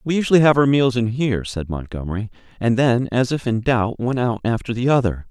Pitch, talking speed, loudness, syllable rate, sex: 120 Hz, 225 wpm, -19 LUFS, 5.8 syllables/s, male